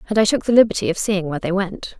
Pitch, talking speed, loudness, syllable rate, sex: 195 Hz, 300 wpm, -19 LUFS, 7.2 syllables/s, female